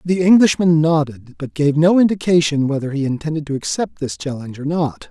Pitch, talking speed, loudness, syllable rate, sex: 150 Hz, 190 wpm, -17 LUFS, 5.6 syllables/s, male